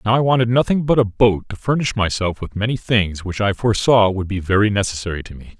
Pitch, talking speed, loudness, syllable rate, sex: 105 Hz, 235 wpm, -18 LUFS, 6.1 syllables/s, male